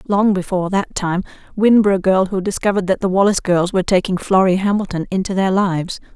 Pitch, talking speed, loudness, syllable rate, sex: 190 Hz, 175 wpm, -17 LUFS, 6.4 syllables/s, female